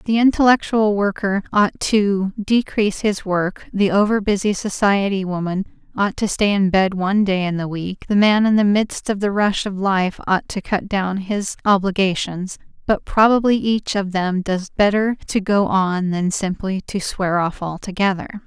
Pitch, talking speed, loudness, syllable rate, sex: 195 Hz, 175 wpm, -19 LUFS, 4.5 syllables/s, female